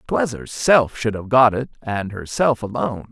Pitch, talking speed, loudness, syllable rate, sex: 115 Hz, 175 wpm, -19 LUFS, 4.6 syllables/s, male